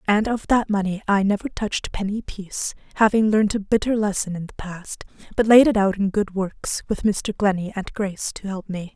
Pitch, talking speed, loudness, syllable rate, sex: 205 Hz, 215 wpm, -22 LUFS, 5.2 syllables/s, female